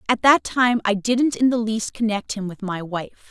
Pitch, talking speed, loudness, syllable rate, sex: 220 Hz, 235 wpm, -21 LUFS, 4.7 syllables/s, female